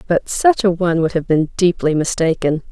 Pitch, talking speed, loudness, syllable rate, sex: 175 Hz, 200 wpm, -16 LUFS, 5.3 syllables/s, female